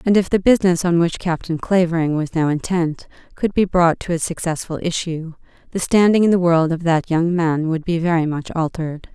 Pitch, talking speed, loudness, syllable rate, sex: 170 Hz, 210 wpm, -18 LUFS, 5.4 syllables/s, female